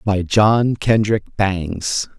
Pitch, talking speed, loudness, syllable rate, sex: 100 Hz, 110 wpm, -17 LUFS, 2.6 syllables/s, male